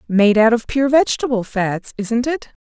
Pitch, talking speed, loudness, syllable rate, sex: 235 Hz, 180 wpm, -17 LUFS, 4.6 syllables/s, female